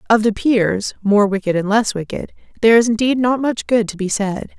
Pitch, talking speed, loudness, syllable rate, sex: 215 Hz, 225 wpm, -17 LUFS, 5.3 syllables/s, female